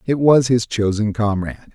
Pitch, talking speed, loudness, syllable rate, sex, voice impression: 115 Hz, 170 wpm, -17 LUFS, 4.9 syllables/s, male, masculine, middle-aged, thick, tensed, slightly powerful, slightly hard, slightly muffled, slightly raspy, cool, calm, mature, slightly friendly, wild, lively, slightly modest